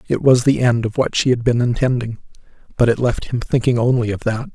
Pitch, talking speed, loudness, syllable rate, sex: 125 Hz, 240 wpm, -17 LUFS, 5.7 syllables/s, male